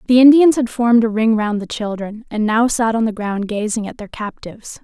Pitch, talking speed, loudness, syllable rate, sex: 225 Hz, 235 wpm, -16 LUFS, 5.4 syllables/s, female